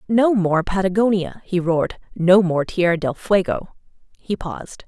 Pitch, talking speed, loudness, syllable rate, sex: 185 Hz, 150 wpm, -19 LUFS, 4.6 syllables/s, female